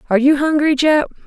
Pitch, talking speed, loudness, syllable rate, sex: 285 Hz, 190 wpm, -15 LUFS, 6.7 syllables/s, female